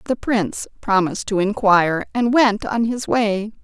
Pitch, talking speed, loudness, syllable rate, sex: 210 Hz, 165 wpm, -19 LUFS, 4.7 syllables/s, female